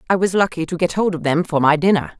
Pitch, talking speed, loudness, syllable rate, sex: 170 Hz, 300 wpm, -18 LUFS, 6.7 syllables/s, female